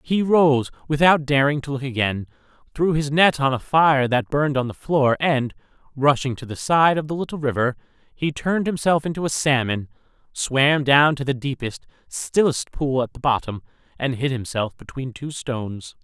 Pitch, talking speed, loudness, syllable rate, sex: 140 Hz, 185 wpm, -21 LUFS, 4.9 syllables/s, male